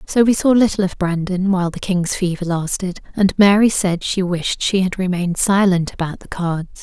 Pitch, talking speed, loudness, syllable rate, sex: 185 Hz, 200 wpm, -17 LUFS, 5.1 syllables/s, female